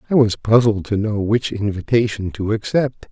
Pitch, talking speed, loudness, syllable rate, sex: 110 Hz, 175 wpm, -18 LUFS, 4.8 syllables/s, male